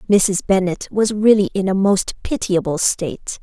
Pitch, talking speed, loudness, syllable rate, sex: 195 Hz, 160 wpm, -18 LUFS, 4.6 syllables/s, female